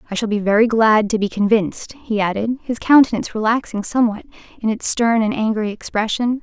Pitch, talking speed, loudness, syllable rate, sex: 220 Hz, 185 wpm, -18 LUFS, 5.9 syllables/s, female